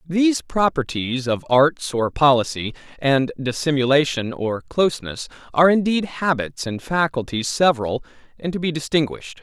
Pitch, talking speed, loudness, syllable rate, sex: 145 Hz, 125 wpm, -20 LUFS, 4.9 syllables/s, male